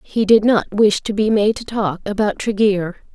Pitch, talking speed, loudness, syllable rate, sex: 205 Hz, 210 wpm, -17 LUFS, 4.7 syllables/s, female